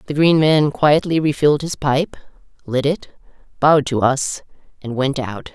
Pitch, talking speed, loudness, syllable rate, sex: 145 Hz, 160 wpm, -17 LUFS, 4.8 syllables/s, female